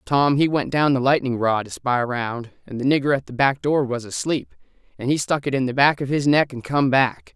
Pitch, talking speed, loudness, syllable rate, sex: 135 Hz, 260 wpm, -21 LUFS, 5.4 syllables/s, male